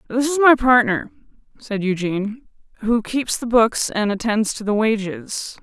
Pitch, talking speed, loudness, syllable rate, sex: 225 Hz, 160 wpm, -19 LUFS, 4.4 syllables/s, female